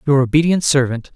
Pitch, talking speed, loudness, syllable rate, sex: 140 Hz, 155 wpm, -15 LUFS, 5.9 syllables/s, male